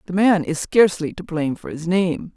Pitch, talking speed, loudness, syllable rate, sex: 175 Hz, 230 wpm, -20 LUFS, 5.5 syllables/s, female